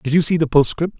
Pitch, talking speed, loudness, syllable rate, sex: 155 Hz, 300 wpm, -17 LUFS, 6.5 syllables/s, male